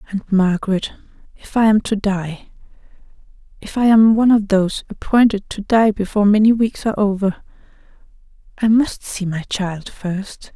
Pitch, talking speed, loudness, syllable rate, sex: 205 Hz, 140 wpm, -17 LUFS, 5.0 syllables/s, female